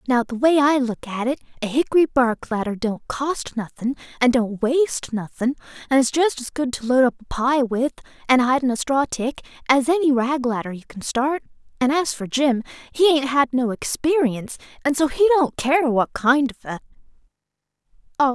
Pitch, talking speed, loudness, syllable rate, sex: 260 Hz, 195 wpm, -21 LUFS, 5.1 syllables/s, female